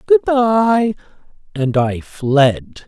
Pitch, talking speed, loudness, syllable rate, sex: 185 Hz, 105 wpm, -15 LUFS, 2.4 syllables/s, male